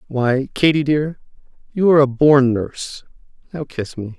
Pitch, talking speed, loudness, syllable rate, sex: 140 Hz, 160 wpm, -17 LUFS, 4.7 syllables/s, male